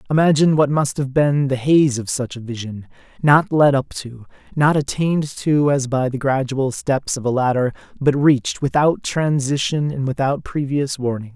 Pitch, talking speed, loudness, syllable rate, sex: 135 Hz, 180 wpm, -18 LUFS, 4.8 syllables/s, male